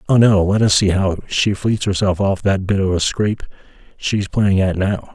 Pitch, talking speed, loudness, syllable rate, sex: 100 Hz, 210 wpm, -17 LUFS, 4.9 syllables/s, male